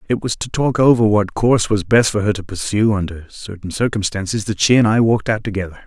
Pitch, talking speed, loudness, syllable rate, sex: 105 Hz, 235 wpm, -17 LUFS, 6.0 syllables/s, male